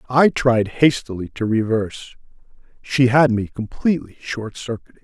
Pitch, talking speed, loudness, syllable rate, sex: 120 Hz, 130 wpm, -19 LUFS, 4.9 syllables/s, male